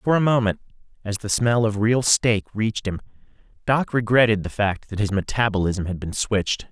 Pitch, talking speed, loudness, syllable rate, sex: 105 Hz, 190 wpm, -21 LUFS, 5.3 syllables/s, male